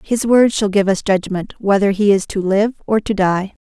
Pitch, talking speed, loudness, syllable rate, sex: 200 Hz, 230 wpm, -16 LUFS, 4.8 syllables/s, female